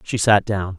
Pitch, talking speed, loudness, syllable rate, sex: 100 Hz, 230 wpm, -18 LUFS, 4.4 syllables/s, male